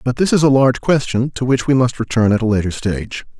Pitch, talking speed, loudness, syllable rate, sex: 125 Hz, 265 wpm, -16 LUFS, 6.3 syllables/s, male